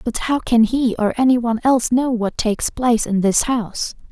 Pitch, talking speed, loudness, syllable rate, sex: 235 Hz, 220 wpm, -18 LUFS, 5.5 syllables/s, female